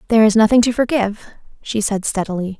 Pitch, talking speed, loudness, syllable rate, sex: 215 Hz, 185 wpm, -17 LUFS, 6.8 syllables/s, female